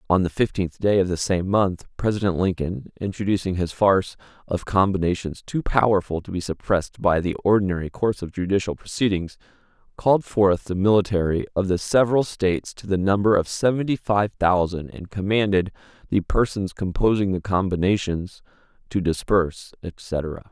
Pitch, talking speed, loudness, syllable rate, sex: 95 Hz, 150 wpm, -22 LUFS, 5.3 syllables/s, male